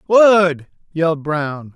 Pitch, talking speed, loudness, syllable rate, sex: 160 Hz, 105 wpm, -16 LUFS, 2.8 syllables/s, male